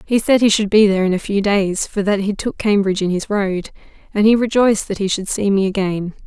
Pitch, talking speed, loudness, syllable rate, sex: 200 Hz, 260 wpm, -17 LUFS, 5.9 syllables/s, female